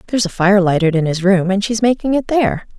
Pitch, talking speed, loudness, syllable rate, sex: 200 Hz, 260 wpm, -15 LUFS, 6.5 syllables/s, female